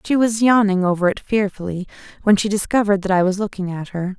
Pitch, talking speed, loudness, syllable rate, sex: 200 Hz, 215 wpm, -18 LUFS, 6.2 syllables/s, female